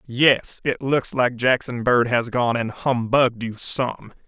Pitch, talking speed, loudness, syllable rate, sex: 120 Hz, 170 wpm, -21 LUFS, 3.8 syllables/s, male